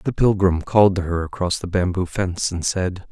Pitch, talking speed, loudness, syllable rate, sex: 90 Hz, 210 wpm, -20 LUFS, 5.2 syllables/s, male